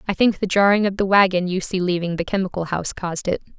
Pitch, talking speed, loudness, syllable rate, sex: 185 Hz, 250 wpm, -20 LUFS, 6.7 syllables/s, female